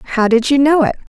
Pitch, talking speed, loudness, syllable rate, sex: 260 Hz, 260 wpm, -13 LUFS, 7.6 syllables/s, female